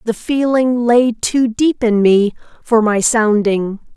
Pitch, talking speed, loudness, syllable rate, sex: 230 Hz, 150 wpm, -14 LUFS, 3.5 syllables/s, female